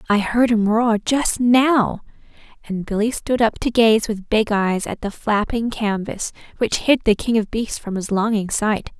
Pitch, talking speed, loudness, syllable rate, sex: 220 Hz, 195 wpm, -19 LUFS, 4.2 syllables/s, female